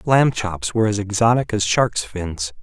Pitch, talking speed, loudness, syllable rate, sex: 105 Hz, 185 wpm, -19 LUFS, 4.5 syllables/s, male